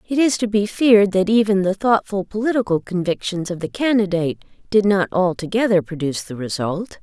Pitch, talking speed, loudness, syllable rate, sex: 195 Hz, 170 wpm, -19 LUFS, 5.7 syllables/s, female